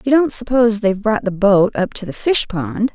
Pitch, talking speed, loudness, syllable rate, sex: 215 Hz, 225 wpm, -16 LUFS, 5.3 syllables/s, female